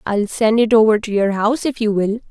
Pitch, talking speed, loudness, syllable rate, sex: 220 Hz, 260 wpm, -16 LUFS, 5.7 syllables/s, female